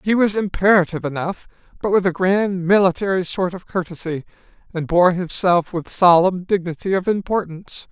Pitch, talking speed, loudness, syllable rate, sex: 180 Hz, 150 wpm, -19 LUFS, 5.3 syllables/s, male